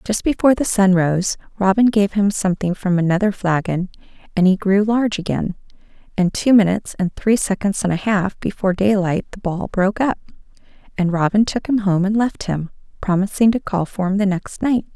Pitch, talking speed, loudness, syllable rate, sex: 195 Hz, 195 wpm, -18 LUFS, 5.6 syllables/s, female